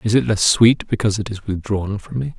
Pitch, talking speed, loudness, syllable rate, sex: 105 Hz, 250 wpm, -18 LUFS, 5.7 syllables/s, male